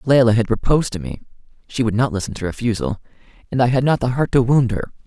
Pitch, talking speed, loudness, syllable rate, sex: 115 Hz, 235 wpm, -19 LUFS, 6.7 syllables/s, male